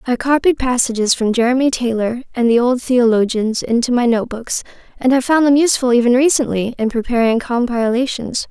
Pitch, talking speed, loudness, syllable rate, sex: 245 Hz, 170 wpm, -16 LUFS, 5.5 syllables/s, female